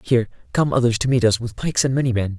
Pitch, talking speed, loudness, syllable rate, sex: 120 Hz, 275 wpm, -20 LUFS, 7.3 syllables/s, male